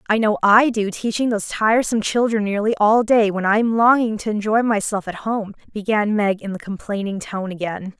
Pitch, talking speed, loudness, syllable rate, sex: 210 Hz, 190 wpm, -19 LUFS, 5.3 syllables/s, female